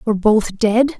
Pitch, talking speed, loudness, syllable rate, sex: 220 Hz, 180 wpm, -16 LUFS, 4.7 syllables/s, female